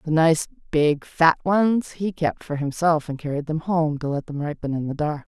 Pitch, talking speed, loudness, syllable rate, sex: 155 Hz, 225 wpm, -23 LUFS, 4.7 syllables/s, female